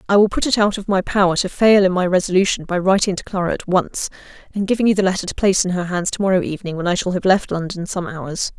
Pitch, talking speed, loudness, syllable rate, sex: 185 Hz, 280 wpm, -18 LUFS, 6.7 syllables/s, female